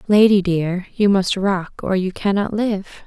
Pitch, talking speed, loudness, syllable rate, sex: 195 Hz, 175 wpm, -18 LUFS, 3.9 syllables/s, female